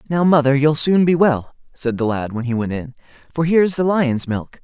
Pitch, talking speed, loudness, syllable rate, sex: 140 Hz, 245 wpm, -18 LUFS, 5.2 syllables/s, male